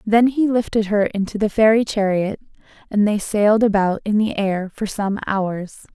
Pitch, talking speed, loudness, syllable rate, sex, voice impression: 205 Hz, 180 wpm, -19 LUFS, 4.7 syllables/s, female, feminine, adult-like, sincere, slightly calm, friendly, slightly sweet